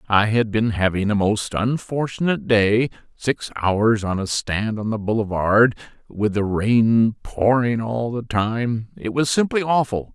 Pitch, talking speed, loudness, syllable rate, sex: 110 Hz, 155 wpm, -20 LUFS, 4.0 syllables/s, male